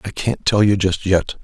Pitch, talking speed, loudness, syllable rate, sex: 100 Hz, 250 wpm, -18 LUFS, 4.6 syllables/s, male